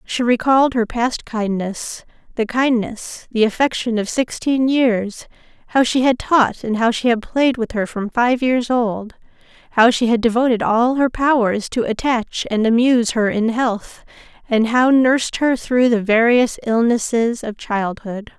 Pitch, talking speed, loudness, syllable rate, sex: 235 Hz, 155 wpm, -17 LUFS, 4.2 syllables/s, female